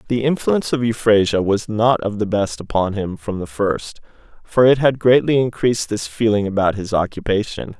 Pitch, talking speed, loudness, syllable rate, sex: 110 Hz, 185 wpm, -18 LUFS, 5.2 syllables/s, male